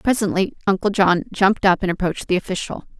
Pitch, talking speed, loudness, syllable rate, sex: 190 Hz, 180 wpm, -19 LUFS, 6.5 syllables/s, female